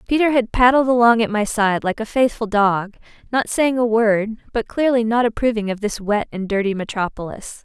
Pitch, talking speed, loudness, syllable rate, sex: 225 Hz, 195 wpm, -18 LUFS, 5.2 syllables/s, female